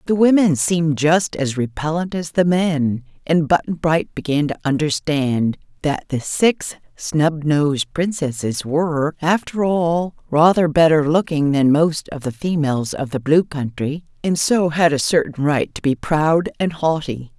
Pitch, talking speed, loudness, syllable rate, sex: 155 Hz, 160 wpm, -18 LUFS, 4.3 syllables/s, female